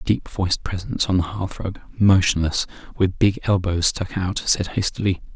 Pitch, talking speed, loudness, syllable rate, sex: 95 Hz, 170 wpm, -21 LUFS, 5.1 syllables/s, male